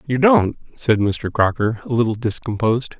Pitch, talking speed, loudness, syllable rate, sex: 120 Hz, 160 wpm, -19 LUFS, 5.1 syllables/s, male